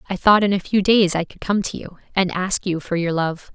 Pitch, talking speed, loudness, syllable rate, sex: 185 Hz, 285 wpm, -19 LUFS, 5.4 syllables/s, female